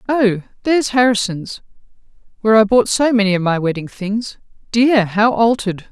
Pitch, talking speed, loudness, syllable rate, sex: 215 Hz, 150 wpm, -16 LUFS, 5.2 syllables/s, female